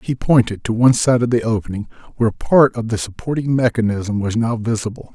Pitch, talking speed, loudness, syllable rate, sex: 115 Hz, 200 wpm, -17 LUFS, 5.9 syllables/s, male